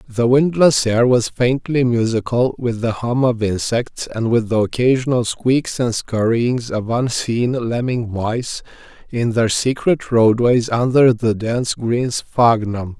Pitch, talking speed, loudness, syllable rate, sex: 120 Hz, 145 wpm, -17 LUFS, 3.8 syllables/s, male